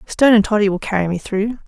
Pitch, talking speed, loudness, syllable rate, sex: 205 Hz, 250 wpm, -17 LUFS, 6.7 syllables/s, female